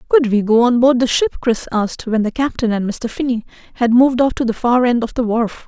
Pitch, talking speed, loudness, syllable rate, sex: 240 Hz, 265 wpm, -16 LUFS, 5.7 syllables/s, female